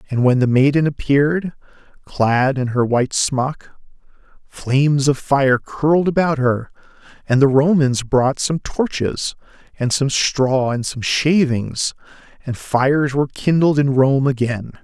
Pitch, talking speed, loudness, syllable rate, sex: 135 Hz, 140 wpm, -17 LUFS, 4.1 syllables/s, male